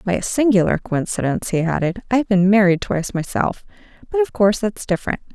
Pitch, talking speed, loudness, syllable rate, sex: 200 Hz, 180 wpm, -19 LUFS, 6.3 syllables/s, female